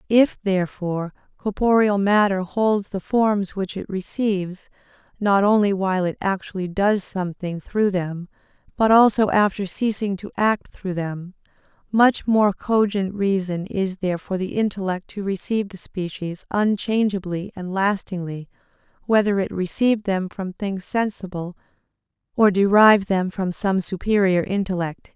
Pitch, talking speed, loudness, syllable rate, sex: 195 Hz, 135 wpm, -21 LUFS, 4.6 syllables/s, female